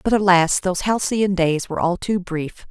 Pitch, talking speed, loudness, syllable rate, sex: 185 Hz, 200 wpm, -19 LUFS, 5.0 syllables/s, female